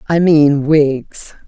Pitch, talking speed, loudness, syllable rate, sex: 150 Hz, 120 wpm, -12 LUFS, 2.6 syllables/s, female